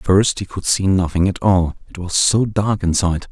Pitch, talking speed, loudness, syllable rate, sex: 95 Hz, 235 wpm, -17 LUFS, 5.2 syllables/s, male